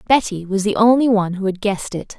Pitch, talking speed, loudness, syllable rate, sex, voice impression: 205 Hz, 250 wpm, -18 LUFS, 6.4 syllables/s, female, very feminine, very young, very thin, slightly tensed, powerful, very bright, slightly soft, very clear, very fluent, very cute, intellectual, very refreshing, sincere, calm, very friendly, very reassuring, very unique, elegant, slightly wild, very sweet, lively, kind, slightly intense, slightly sharp